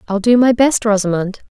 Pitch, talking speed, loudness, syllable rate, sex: 215 Hz, 200 wpm, -14 LUFS, 5.3 syllables/s, female